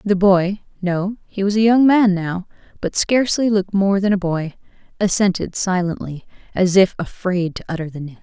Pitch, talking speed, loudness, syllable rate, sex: 190 Hz, 170 wpm, -18 LUFS, 5.1 syllables/s, female